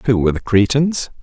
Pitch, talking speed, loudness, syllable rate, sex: 120 Hz, 195 wpm, -16 LUFS, 6.1 syllables/s, male